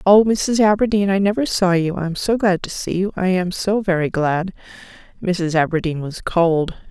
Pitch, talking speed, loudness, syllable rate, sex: 185 Hz, 190 wpm, -18 LUFS, 4.9 syllables/s, female